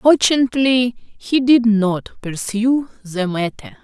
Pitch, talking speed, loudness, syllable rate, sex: 230 Hz, 110 wpm, -17 LUFS, 4.0 syllables/s, female